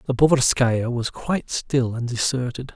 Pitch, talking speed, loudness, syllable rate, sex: 125 Hz, 155 wpm, -22 LUFS, 4.6 syllables/s, male